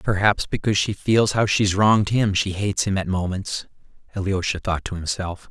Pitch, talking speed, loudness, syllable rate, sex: 100 Hz, 185 wpm, -21 LUFS, 5.3 syllables/s, male